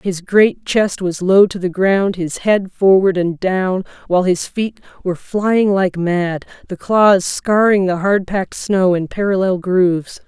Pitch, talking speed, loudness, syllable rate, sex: 190 Hz, 175 wpm, -16 LUFS, 4.0 syllables/s, female